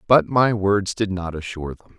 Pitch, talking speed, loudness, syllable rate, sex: 95 Hz, 210 wpm, -21 LUFS, 5.2 syllables/s, male